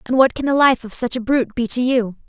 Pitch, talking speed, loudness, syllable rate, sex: 250 Hz, 315 wpm, -17 LUFS, 6.3 syllables/s, female